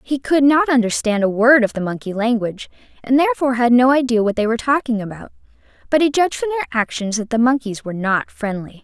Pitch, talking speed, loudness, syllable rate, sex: 245 Hz, 215 wpm, -17 LUFS, 6.7 syllables/s, female